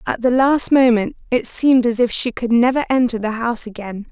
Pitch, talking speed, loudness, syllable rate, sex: 240 Hz, 220 wpm, -17 LUFS, 5.6 syllables/s, female